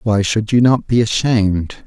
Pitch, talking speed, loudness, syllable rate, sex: 110 Hz, 195 wpm, -15 LUFS, 4.5 syllables/s, male